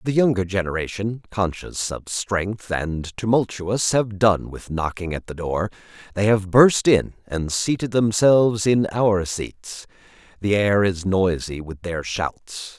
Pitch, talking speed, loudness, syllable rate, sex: 100 Hz, 150 wpm, -21 LUFS, 3.9 syllables/s, male